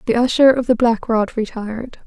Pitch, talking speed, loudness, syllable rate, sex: 235 Hz, 205 wpm, -17 LUFS, 5.3 syllables/s, female